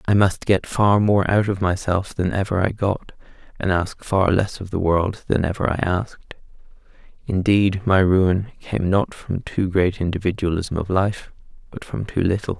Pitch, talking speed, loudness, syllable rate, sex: 95 Hz, 180 wpm, -21 LUFS, 4.6 syllables/s, male